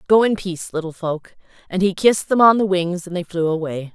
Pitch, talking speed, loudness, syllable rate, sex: 180 Hz, 245 wpm, -19 LUFS, 5.8 syllables/s, female